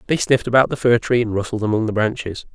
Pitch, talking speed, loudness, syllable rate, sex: 115 Hz, 260 wpm, -18 LUFS, 6.9 syllables/s, male